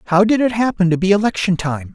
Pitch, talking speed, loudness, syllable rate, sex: 195 Hz, 245 wpm, -16 LUFS, 6.4 syllables/s, male